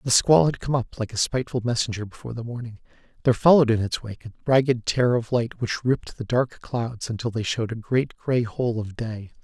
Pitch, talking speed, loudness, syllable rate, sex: 120 Hz, 230 wpm, -24 LUFS, 5.8 syllables/s, male